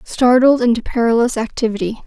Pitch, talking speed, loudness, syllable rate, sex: 235 Hz, 115 wpm, -15 LUFS, 5.6 syllables/s, female